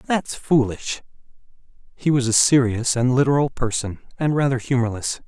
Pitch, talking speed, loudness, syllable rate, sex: 125 Hz, 135 wpm, -20 LUFS, 5.0 syllables/s, male